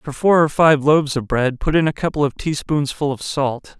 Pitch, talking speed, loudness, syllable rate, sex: 145 Hz, 255 wpm, -18 LUFS, 5.2 syllables/s, male